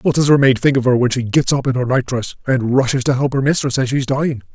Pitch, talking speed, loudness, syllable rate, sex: 130 Hz, 305 wpm, -16 LUFS, 6.3 syllables/s, male